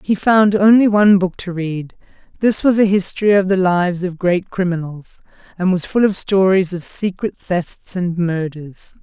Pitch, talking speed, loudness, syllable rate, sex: 185 Hz, 180 wpm, -16 LUFS, 4.6 syllables/s, female